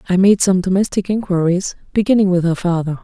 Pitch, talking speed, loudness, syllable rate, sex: 185 Hz, 180 wpm, -16 LUFS, 6.0 syllables/s, female